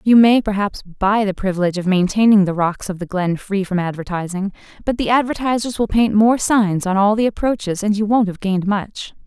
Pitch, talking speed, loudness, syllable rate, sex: 205 Hz, 215 wpm, -18 LUFS, 5.5 syllables/s, female